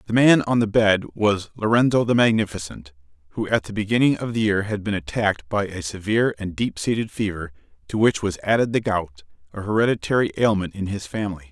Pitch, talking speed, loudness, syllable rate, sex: 100 Hz, 200 wpm, -21 LUFS, 6.0 syllables/s, male